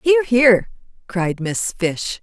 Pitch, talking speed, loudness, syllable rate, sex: 210 Hz, 135 wpm, -18 LUFS, 2.8 syllables/s, female